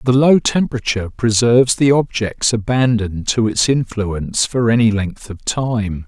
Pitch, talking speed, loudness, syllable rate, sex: 115 Hz, 150 wpm, -16 LUFS, 4.7 syllables/s, male